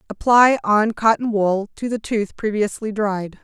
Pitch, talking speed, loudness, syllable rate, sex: 215 Hz, 155 wpm, -19 LUFS, 4.2 syllables/s, female